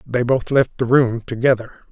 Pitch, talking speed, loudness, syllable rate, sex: 125 Hz, 190 wpm, -18 LUFS, 5.4 syllables/s, male